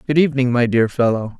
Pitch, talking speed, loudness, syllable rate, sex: 125 Hz, 215 wpm, -17 LUFS, 6.5 syllables/s, male